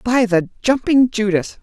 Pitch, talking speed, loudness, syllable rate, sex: 225 Hz, 150 wpm, -17 LUFS, 4.1 syllables/s, female